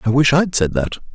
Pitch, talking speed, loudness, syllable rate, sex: 130 Hz, 260 wpm, -17 LUFS, 5.4 syllables/s, male